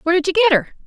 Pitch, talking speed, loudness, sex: 340 Hz, 345 wpm, -16 LUFS, female